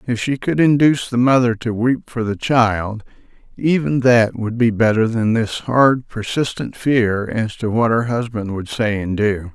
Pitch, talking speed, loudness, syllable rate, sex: 115 Hz, 190 wpm, -17 LUFS, 4.3 syllables/s, male